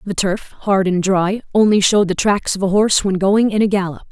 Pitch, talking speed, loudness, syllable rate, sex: 195 Hz, 250 wpm, -16 LUFS, 5.4 syllables/s, female